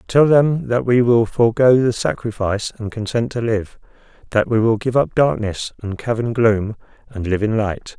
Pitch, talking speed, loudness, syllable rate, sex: 115 Hz, 190 wpm, -18 LUFS, 4.8 syllables/s, male